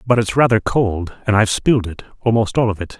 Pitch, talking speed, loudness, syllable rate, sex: 110 Hz, 220 wpm, -17 LUFS, 6.0 syllables/s, male